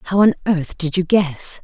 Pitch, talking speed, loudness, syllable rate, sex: 175 Hz, 220 wpm, -18 LUFS, 4.1 syllables/s, female